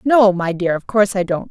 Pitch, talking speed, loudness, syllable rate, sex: 195 Hz, 280 wpm, -17 LUFS, 5.5 syllables/s, female